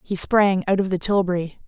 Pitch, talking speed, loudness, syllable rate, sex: 190 Hz, 215 wpm, -20 LUFS, 5.3 syllables/s, female